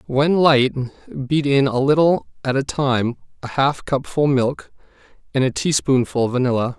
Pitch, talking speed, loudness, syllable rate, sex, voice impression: 135 Hz, 150 wpm, -19 LUFS, 4.5 syllables/s, male, masculine, adult-like, slightly refreshing, slightly friendly, kind